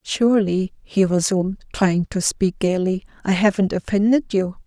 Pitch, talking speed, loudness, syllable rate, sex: 195 Hz, 140 wpm, -20 LUFS, 4.7 syllables/s, female